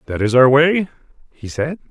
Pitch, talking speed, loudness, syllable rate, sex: 140 Hz, 190 wpm, -15 LUFS, 4.9 syllables/s, male